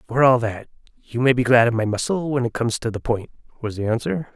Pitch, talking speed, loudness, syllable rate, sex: 120 Hz, 260 wpm, -21 LUFS, 6.2 syllables/s, male